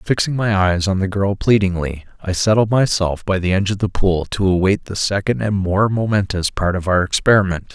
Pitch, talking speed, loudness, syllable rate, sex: 100 Hz, 210 wpm, -17 LUFS, 5.4 syllables/s, male